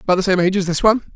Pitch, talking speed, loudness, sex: 190 Hz, 365 wpm, -16 LUFS, male